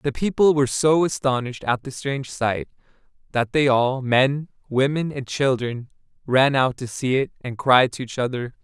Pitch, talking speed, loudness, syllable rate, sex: 130 Hz, 165 wpm, -21 LUFS, 4.8 syllables/s, male